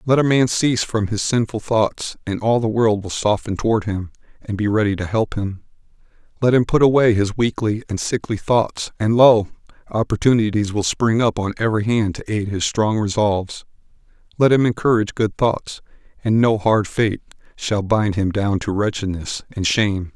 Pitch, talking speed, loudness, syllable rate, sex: 110 Hz, 185 wpm, -19 LUFS, 5.0 syllables/s, male